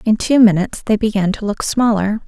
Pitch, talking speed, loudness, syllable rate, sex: 210 Hz, 210 wpm, -15 LUFS, 5.6 syllables/s, female